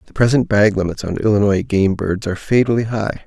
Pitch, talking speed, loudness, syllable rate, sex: 105 Hz, 200 wpm, -17 LUFS, 5.9 syllables/s, male